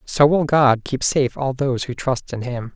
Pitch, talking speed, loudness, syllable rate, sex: 130 Hz, 240 wpm, -19 LUFS, 4.9 syllables/s, male